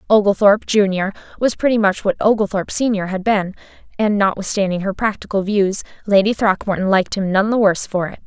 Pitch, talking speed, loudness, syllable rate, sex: 200 Hz, 175 wpm, -17 LUFS, 6.1 syllables/s, female